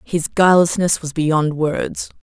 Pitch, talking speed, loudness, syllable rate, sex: 165 Hz, 135 wpm, -17 LUFS, 3.9 syllables/s, female